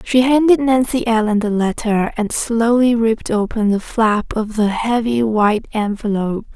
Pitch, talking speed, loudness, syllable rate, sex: 225 Hz, 155 wpm, -16 LUFS, 4.6 syllables/s, female